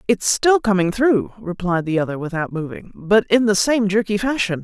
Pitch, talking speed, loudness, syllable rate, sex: 205 Hz, 195 wpm, -18 LUFS, 5.0 syllables/s, female